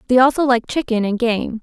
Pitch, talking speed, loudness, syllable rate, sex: 240 Hz, 220 wpm, -17 LUFS, 5.6 syllables/s, female